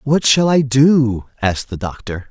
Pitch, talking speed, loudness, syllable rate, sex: 125 Hz, 180 wpm, -15 LUFS, 4.3 syllables/s, male